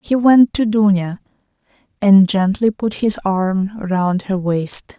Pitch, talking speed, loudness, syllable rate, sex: 200 Hz, 145 wpm, -16 LUFS, 3.5 syllables/s, female